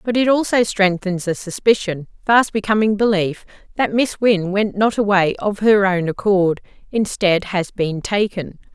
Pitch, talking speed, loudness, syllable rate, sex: 200 Hz, 160 wpm, -18 LUFS, 4.4 syllables/s, female